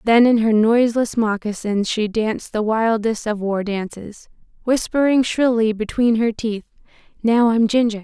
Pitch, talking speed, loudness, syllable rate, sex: 225 Hz, 150 wpm, -18 LUFS, 4.6 syllables/s, female